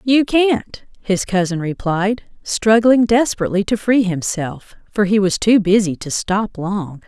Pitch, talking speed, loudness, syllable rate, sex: 205 Hz, 155 wpm, -17 LUFS, 4.2 syllables/s, female